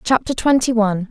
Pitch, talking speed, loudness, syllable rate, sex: 230 Hz, 165 wpm, -17 LUFS, 5.9 syllables/s, female